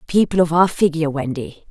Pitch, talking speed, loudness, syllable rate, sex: 165 Hz, 175 wpm, -18 LUFS, 5.9 syllables/s, female